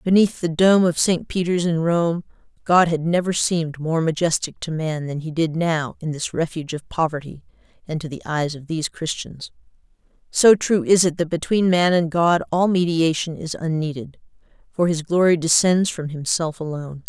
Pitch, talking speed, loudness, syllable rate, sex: 165 Hz, 180 wpm, -20 LUFS, 5.0 syllables/s, female